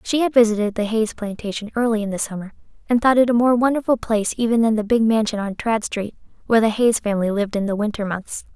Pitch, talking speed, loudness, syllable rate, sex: 220 Hz, 240 wpm, -20 LUFS, 6.5 syllables/s, female